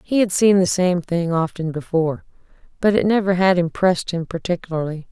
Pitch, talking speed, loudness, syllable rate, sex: 180 Hz, 175 wpm, -19 LUFS, 5.6 syllables/s, female